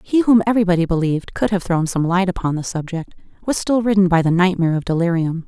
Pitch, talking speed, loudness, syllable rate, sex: 185 Hz, 230 wpm, -18 LUFS, 6.3 syllables/s, female